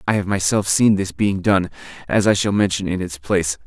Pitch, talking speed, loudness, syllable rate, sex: 95 Hz, 230 wpm, -19 LUFS, 5.5 syllables/s, male